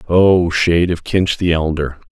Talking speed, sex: 170 wpm, male